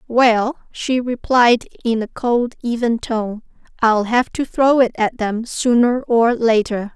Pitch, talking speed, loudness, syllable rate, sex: 235 Hz, 155 wpm, -17 LUFS, 3.7 syllables/s, female